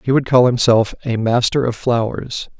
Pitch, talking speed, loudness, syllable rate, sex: 120 Hz, 185 wpm, -16 LUFS, 4.7 syllables/s, male